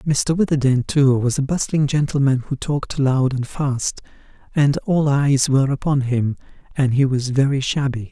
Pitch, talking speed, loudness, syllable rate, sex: 135 Hz, 170 wpm, -19 LUFS, 4.6 syllables/s, male